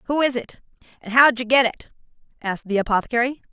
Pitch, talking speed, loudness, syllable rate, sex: 240 Hz, 205 wpm, -20 LUFS, 7.3 syllables/s, female